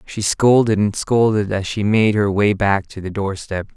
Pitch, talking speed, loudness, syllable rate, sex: 100 Hz, 205 wpm, -18 LUFS, 4.4 syllables/s, male